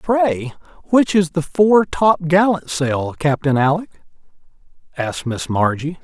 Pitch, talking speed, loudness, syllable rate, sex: 165 Hz, 130 wpm, -17 LUFS, 4.0 syllables/s, male